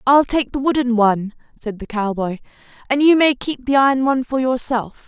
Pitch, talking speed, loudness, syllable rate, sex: 250 Hz, 200 wpm, -18 LUFS, 5.5 syllables/s, female